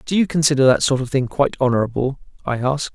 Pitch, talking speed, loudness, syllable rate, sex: 135 Hz, 225 wpm, -18 LUFS, 6.9 syllables/s, male